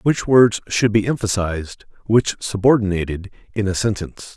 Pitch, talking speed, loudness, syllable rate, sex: 105 Hz, 140 wpm, -18 LUFS, 5.1 syllables/s, male